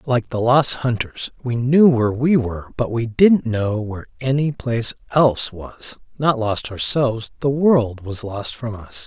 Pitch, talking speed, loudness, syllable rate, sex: 120 Hz, 180 wpm, -19 LUFS, 4.4 syllables/s, male